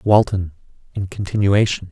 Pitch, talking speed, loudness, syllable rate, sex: 95 Hz, 95 wpm, -19 LUFS, 4.8 syllables/s, male